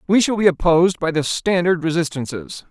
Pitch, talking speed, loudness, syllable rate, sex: 170 Hz, 180 wpm, -18 LUFS, 5.6 syllables/s, male